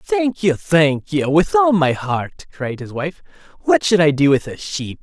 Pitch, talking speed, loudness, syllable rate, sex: 160 Hz, 215 wpm, -17 LUFS, 4.2 syllables/s, male